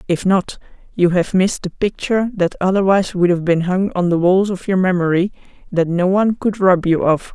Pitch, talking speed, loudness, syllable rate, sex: 185 Hz, 210 wpm, -17 LUFS, 5.5 syllables/s, female